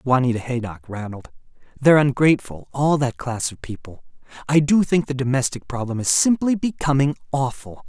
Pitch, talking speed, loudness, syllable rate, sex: 130 Hz, 150 wpm, -20 LUFS, 5.6 syllables/s, male